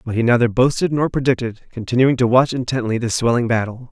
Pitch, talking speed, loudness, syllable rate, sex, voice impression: 120 Hz, 200 wpm, -18 LUFS, 6.3 syllables/s, male, masculine, adult-like, tensed, powerful, hard, fluent, cool, intellectual, wild, lively, intense, slightly sharp, light